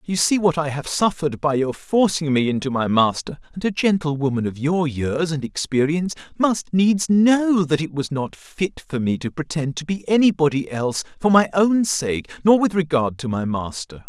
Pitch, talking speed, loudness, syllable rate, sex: 160 Hz, 210 wpm, -20 LUFS, 4.9 syllables/s, male